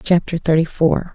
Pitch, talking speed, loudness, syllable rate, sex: 165 Hz, 155 wpm, -17 LUFS, 4.8 syllables/s, female